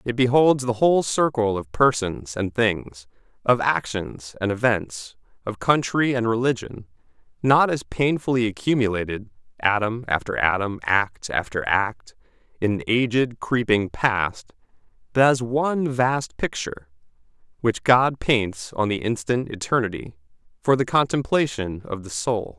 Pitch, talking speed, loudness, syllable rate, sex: 115 Hz, 135 wpm, -22 LUFS, 4.3 syllables/s, male